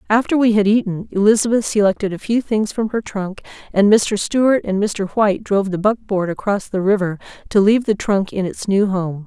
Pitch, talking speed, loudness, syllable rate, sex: 205 Hz, 205 wpm, -17 LUFS, 5.5 syllables/s, female